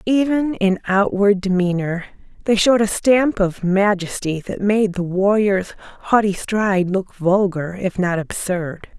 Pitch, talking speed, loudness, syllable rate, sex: 195 Hz, 140 wpm, -18 LUFS, 4.0 syllables/s, female